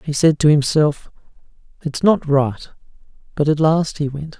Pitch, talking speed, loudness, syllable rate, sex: 150 Hz, 165 wpm, -17 LUFS, 4.5 syllables/s, male